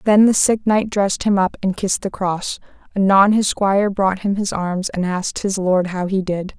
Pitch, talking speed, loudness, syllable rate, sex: 195 Hz, 230 wpm, -18 LUFS, 5.0 syllables/s, female